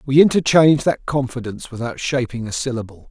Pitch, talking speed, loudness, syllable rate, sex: 130 Hz, 155 wpm, -18 LUFS, 6.0 syllables/s, male